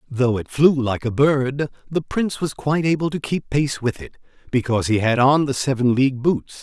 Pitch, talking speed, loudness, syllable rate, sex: 135 Hz, 215 wpm, -20 LUFS, 5.3 syllables/s, male